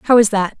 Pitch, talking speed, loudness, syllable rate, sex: 215 Hz, 300 wpm, -14 LUFS, 5.5 syllables/s, female